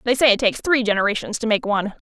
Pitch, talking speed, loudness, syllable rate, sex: 225 Hz, 260 wpm, -19 LUFS, 7.6 syllables/s, female